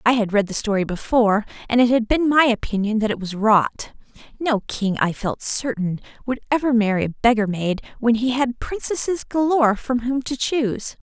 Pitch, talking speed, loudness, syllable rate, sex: 235 Hz, 195 wpm, -20 LUFS, 5.2 syllables/s, female